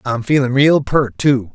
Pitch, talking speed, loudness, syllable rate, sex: 130 Hz, 195 wpm, -15 LUFS, 4.2 syllables/s, male